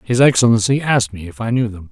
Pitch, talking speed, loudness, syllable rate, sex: 115 Hz, 250 wpm, -16 LUFS, 6.6 syllables/s, male